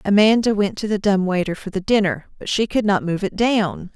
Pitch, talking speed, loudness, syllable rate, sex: 200 Hz, 245 wpm, -19 LUFS, 5.4 syllables/s, female